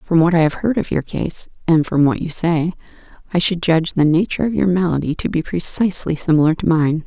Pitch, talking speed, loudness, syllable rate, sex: 165 Hz, 230 wpm, -17 LUFS, 6.0 syllables/s, female